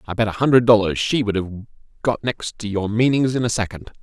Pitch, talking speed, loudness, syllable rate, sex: 110 Hz, 240 wpm, -19 LUFS, 5.3 syllables/s, male